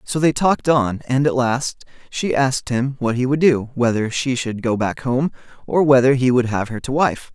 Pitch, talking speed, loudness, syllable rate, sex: 130 Hz, 230 wpm, -19 LUFS, 5.0 syllables/s, male